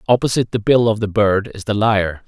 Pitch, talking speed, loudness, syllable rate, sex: 105 Hz, 240 wpm, -17 LUFS, 6.3 syllables/s, male